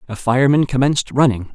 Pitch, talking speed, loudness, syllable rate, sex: 130 Hz, 155 wpm, -16 LUFS, 6.5 syllables/s, male